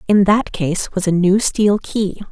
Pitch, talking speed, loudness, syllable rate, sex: 195 Hz, 210 wpm, -16 LUFS, 3.9 syllables/s, female